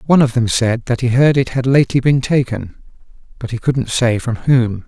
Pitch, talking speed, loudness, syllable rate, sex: 125 Hz, 220 wpm, -15 LUFS, 5.4 syllables/s, male